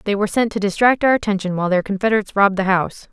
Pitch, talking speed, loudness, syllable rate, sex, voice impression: 205 Hz, 250 wpm, -18 LUFS, 8.1 syllables/s, female, very feminine, slightly young, slightly adult-like, thin, tensed, powerful, bright, hard, clear, very fluent, cute, slightly intellectual, refreshing, slightly sincere, slightly calm, friendly, reassuring, unique, slightly elegant, wild, slightly sweet, lively, strict, intense, slightly sharp, slightly light